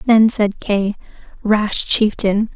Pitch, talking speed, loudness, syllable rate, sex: 210 Hz, 115 wpm, -17 LUFS, 3.1 syllables/s, female